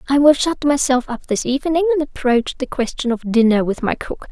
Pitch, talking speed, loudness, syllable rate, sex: 265 Hz, 225 wpm, -18 LUFS, 5.6 syllables/s, female